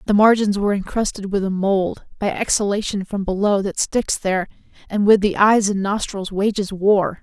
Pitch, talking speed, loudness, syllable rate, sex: 200 Hz, 185 wpm, -19 LUFS, 5.1 syllables/s, female